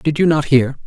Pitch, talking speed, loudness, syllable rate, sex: 145 Hz, 275 wpm, -15 LUFS, 5.2 syllables/s, male